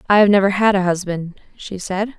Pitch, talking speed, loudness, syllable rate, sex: 195 Hz, 220 wpm, -17 LUFS, 5.4 syllables/s, female